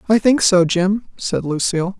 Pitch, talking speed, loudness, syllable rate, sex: 190 Hz, 180 wpm, -17 LUFS, 4.6 syllables/s, female